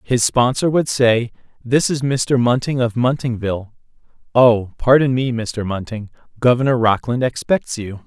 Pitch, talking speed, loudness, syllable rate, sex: 120 Hz, 135 wpm, -17 LUFS, 4.5 syllables/s, male